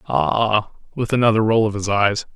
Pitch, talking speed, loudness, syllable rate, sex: 105 Hz, 180 wpm, -18 LUFS, 4.7 syllables/s, male